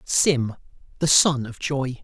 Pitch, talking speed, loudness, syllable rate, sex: 135 Hz, 145 wpm, -21 LUFS, 3.3 syllables/s, male